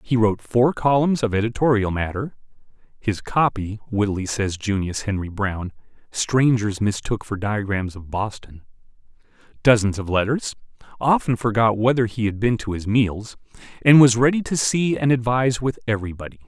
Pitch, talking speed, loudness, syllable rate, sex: 110 Hz, 150 wpm, -21 LUFS, 4.6 syllables/s, male